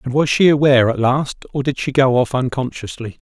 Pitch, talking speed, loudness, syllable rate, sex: 130 Hz, 220 wpm, -16 LUFS, 5.5 syllables/s, male